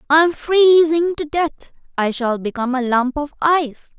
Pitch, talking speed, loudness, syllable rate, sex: 290 Hz, 180 wpm, -17 LUFS, 4.9 syllables/s, female